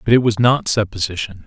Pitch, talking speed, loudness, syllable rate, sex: 110 Hz, 205 wpm, -17 LUFS, 5.8 syllables/s, male